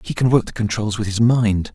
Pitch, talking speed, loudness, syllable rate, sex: 110 Hz, 275 wpm, -18 LUFS, 5.5 syllables/s, male